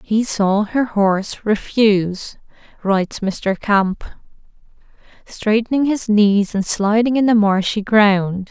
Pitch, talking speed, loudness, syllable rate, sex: 210 Hz, 120 wpm, -17 LUFS, 3.6 syllables/s, female